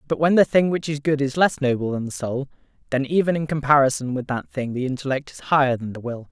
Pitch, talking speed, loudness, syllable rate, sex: 140 Hz, 255 wpm, -22 LUFS, 6.1 syllables/s, male